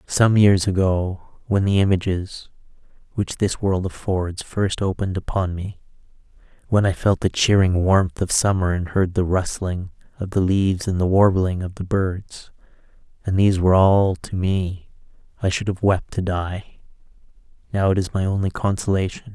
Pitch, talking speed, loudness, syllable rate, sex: 95 Hz, 165 wpm, -20 LUFS, 4.7 syllables/s, male